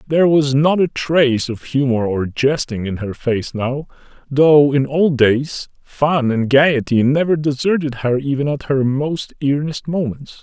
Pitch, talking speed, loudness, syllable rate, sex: 140 Hz, 165 wpm, -17 LUFS, 4.2 syllables/s, male